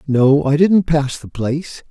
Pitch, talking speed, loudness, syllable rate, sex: 145 Hz, 190 wpm, -16 LUFS, 4.1 syllables/s, male